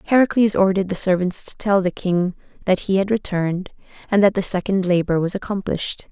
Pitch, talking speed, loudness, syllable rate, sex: 190 Hz, 185 wpm, -20 LUFS, 5.9 syllables/s, female